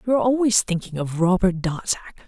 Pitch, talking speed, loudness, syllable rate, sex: 195 Hz, 185 wpm, -21 LUFS, 5.8 syllables/s, female